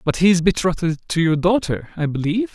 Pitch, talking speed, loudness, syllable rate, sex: 175 Hz, 210 wpm, -19 LUFS, 6.1 syllables/s, male